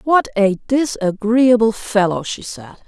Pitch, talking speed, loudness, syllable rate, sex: 220 Hz, 125 wpm, -17 LUFS, 3.8 syllables/s, female